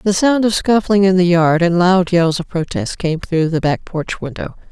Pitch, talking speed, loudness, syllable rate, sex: 180 Hz, 230 wpm, -15 LUFS, 4.6 syllables/s, female